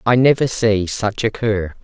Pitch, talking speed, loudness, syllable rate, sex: 110 Hz, 195 wpm, -17 LUFS, 4.2 syllables/s, female